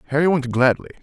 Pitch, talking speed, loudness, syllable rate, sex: 140 Hz, 175 wpm, -19 LUFS, 7.4 syllables/s, male